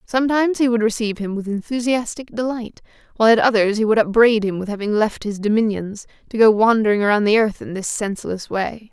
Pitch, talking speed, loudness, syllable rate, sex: 220 Hz, 200 wpm, -18 LUFS, 6.1 syllables/s, female